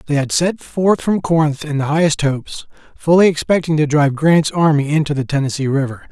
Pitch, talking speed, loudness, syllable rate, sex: 150 Hz, 195 wpm, -16 LUFS, 5.7 syllables/s, male